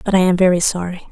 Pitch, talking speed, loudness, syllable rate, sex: 180 Hz, 270 wpm, -16 LUFS, 7.1 syllables/s, female